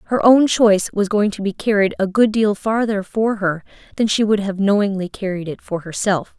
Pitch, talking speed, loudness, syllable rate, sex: 205 Hz, 215 wpm, -18 LUFS, 5.2 syllables/s, female